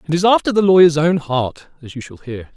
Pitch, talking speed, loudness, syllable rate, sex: 160 Hz, 260 wpm, -14 LUFS, 5.8 syllables/s, male